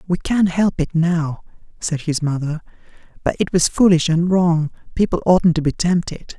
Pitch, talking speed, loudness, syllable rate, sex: 170 Hz, 180 wpm, -18 LUFS, 4.7 syllables/s, male